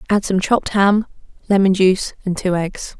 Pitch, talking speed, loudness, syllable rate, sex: 190 Hz, 180 wpm, -17 LUFS, 5.4 syllables/s, female